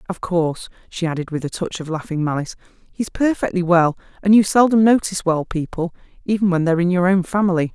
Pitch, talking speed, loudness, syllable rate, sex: 180 Hz, 185 wpm, -19 LUFS, 6.4 syllables/s, female